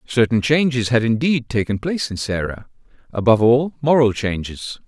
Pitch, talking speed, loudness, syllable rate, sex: 125 Hz, 150 wpm, -18 LUFS, 5.2 syllables/s, male